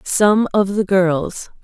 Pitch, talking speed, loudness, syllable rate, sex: 195 Hz, 145 wpm, -16 LUFS, 2.9 syllables/s, female